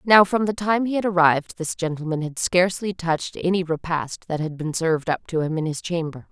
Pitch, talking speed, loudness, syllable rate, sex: 170 Hz, 230 wpm, -22 LUFS, 5.6 syllables/s, female